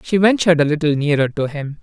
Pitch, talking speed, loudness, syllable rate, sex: 155 Hz, 230 wpm, -17 LUFS, 6.4 syllables/s, male